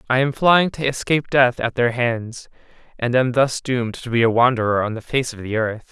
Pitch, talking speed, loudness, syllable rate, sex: 125 Hz, 235 wpm, -19 LUFS, 5.3 syllables/s, male